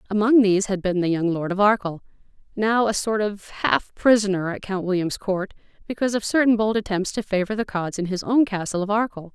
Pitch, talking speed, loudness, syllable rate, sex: 200 Hz, 220 wpm, -22 LUFS, 5.8 syllables/s, female